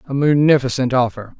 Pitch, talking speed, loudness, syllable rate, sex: 130 Hz, 130 wpm, -16 LUFS, 5.7 syllables/s, male